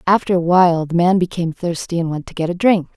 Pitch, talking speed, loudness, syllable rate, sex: 175 Hz, 265 wpm, -17 LUFS, 6.5 syllables/s, female